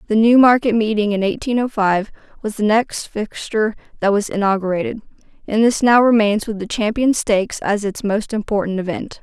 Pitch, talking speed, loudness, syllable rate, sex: 215 Hz, 175 wpm, -17 LUFS, 5.4 syllables/s, female